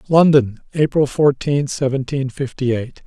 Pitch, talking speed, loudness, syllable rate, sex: 135 Hz, 115 wpm, -18 LUFS, 4.9 syllables/s, male